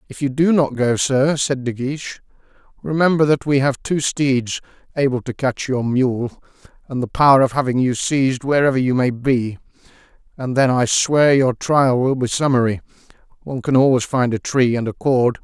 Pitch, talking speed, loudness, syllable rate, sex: 130 Hz, 190 wpm, -18 LUFS, 5.0 syllables/s, male